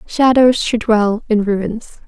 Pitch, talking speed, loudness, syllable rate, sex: 220 Hz, 145 wpm, -15 LUFS, 3.2 syllables/s, female